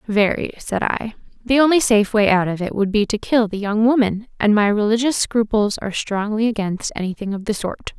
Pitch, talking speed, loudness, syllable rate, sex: 215 Hz, 210 wpm, -19 LUFS, 5.5 syllables/s, female